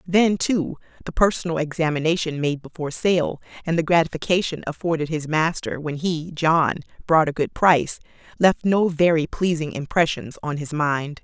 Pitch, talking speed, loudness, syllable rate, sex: 160 Hz, 150 wpm, -22 LUFS, 5.2 syllables/s, female